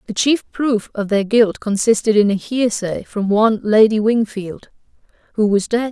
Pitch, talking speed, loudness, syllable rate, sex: 215 Hz, 170 wpm, -17 LUFS, 4.5 syllables/s, female